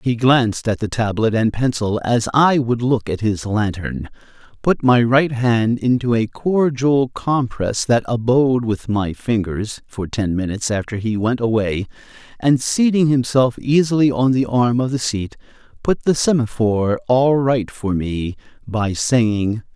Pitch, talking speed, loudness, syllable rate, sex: 120 Hz, 160 wpm, -18 LUFS, 4.6 syllables/s, male